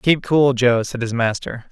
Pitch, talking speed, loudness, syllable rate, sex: 125 Hz, 210 wpm, -18 LUFS, 4.2 syllables/s, male